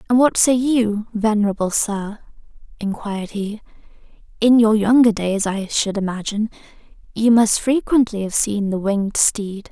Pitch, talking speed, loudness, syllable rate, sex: 215 Hz, 140 wpm, -18 LUFS, 4.7 syllables/s, female